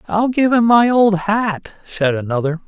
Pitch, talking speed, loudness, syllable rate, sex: 200 Hz, 180 wpm, -15 LUFS, 4.4 syllables/s, male